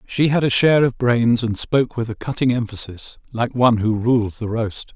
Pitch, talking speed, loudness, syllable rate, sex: 120 Hz, 220 wpm, -19 LUFS, 5.2 syllables/s, male